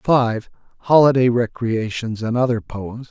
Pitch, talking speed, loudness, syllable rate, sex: 120 Hz, 115 wpm, -19 LUFS, 4.9 syllables/s, male